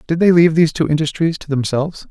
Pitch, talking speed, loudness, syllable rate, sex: 160 Hz, 230 wpm, -16 LUFS, 7.1 syllables/s, male